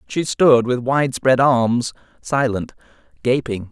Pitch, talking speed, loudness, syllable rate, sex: 125 Hz, 130 wpm, -18 LUFS, 3.6 syllables/s, male